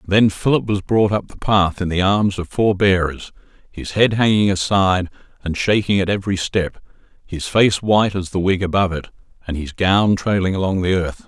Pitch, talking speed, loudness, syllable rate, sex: 95 Hz, 200 wpm, -18 LUFS, 5.3 syllables/s, male